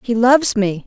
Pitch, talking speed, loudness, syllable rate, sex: 230 Hz, 210 wpm, -15 LUFS, 5.2 syllables/s, female